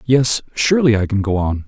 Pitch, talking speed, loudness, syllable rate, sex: 115 Hz, 215 wpm, -16 LUFS, 5.5 syllables/s, male